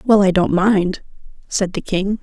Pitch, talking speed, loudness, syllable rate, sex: 195 Hz, 190 wpm, -17 LUFS, 4.2 syllables/s, female